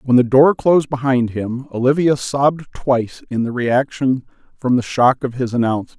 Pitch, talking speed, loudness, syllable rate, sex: 130 Hz, 180 wpm, -17 LUFS, 5.2 syllables/s, male